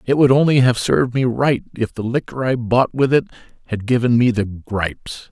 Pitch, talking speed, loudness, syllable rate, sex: 120 Hz, 215 wpm, -18 LUFS, 5.2 syllables/s, male